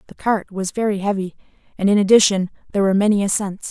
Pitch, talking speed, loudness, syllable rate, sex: 200 Hz, 195 wpm, -18 LUFS, 6.9 syllables/s, female